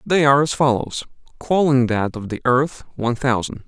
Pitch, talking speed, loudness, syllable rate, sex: 135 Hz, 180 wpm, -19 LUFS, 5.2 syllables/s, male